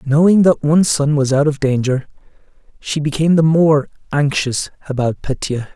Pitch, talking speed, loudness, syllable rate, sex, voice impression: 145 Hz, 155 wpm, -16 LUFS, 5.1 syllables/s, male, masculine, adult-like, slightly halting, slightly cool, sincere, calm